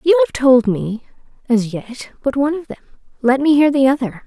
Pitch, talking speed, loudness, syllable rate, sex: 255 Hz, 195 wpm, -16 LUFS, 5.5 syllables/s, female